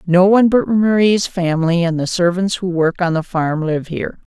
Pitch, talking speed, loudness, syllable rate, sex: 180 Hz, 205 wpm, -16 LUFS, 5.2 syllables/s, female